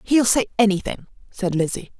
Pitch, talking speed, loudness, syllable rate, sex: 210 Hz, 150 wpm, -21 LUFS, 5.1 syllables/s, female